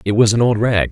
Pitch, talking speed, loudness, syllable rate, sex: 110 Hz, 330 wpm, -15 LUFS, 6.2 syllables/s, male